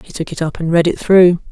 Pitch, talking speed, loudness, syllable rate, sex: 170 Hz, 315 wpm, -14 LUFS, 5.9 syllables/s, female